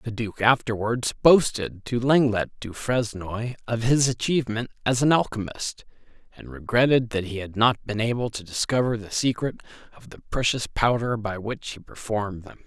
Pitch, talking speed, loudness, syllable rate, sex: 115 Hz, 165 wpm, -24 LUFS, 5.0 syllables/s, male